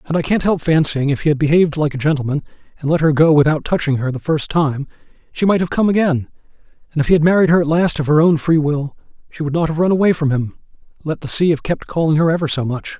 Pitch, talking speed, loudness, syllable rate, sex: 155 Hz, 270 wpm, -16 LUFS, 6.6 syllables/s, male